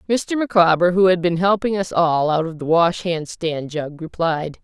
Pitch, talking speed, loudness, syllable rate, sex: 175 Hz, 205 wpm, -19 LUFS, 4.6 syllables/s, female